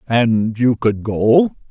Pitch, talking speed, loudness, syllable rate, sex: 120 Hz, 140 wpm, -16 LUFS, 2.9 syllables/s, male